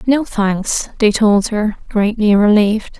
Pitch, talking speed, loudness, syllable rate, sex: 210 Hz, 140 wpm, -15 LUFS, 3.8 syllables/s, female